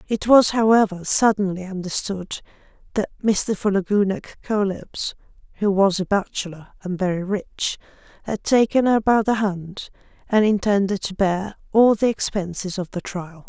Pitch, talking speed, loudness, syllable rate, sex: 200 Hz, 140 wpm, -21 LUFS, 4.6 syllables/s, female